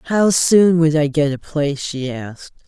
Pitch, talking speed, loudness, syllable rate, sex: 155 Hz, 200 wpm, -16 LUFS, 4.4 syllables/s, female